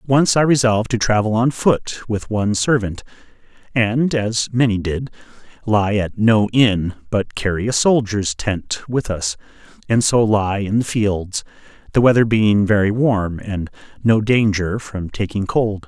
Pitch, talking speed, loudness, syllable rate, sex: 110 Hz, 160 wpm, -18 LUFS, 4.2 syllables/s, male